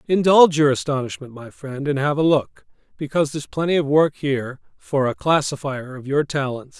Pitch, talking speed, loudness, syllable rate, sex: 145 Hz, 185 wpm, -20 LUFS, 5.6 syllables/s, male